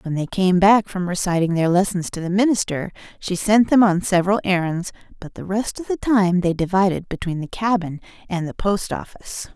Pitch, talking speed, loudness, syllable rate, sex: 185 Hz, 200 wpm, -20 LUFS, 5.4 syllables/s, female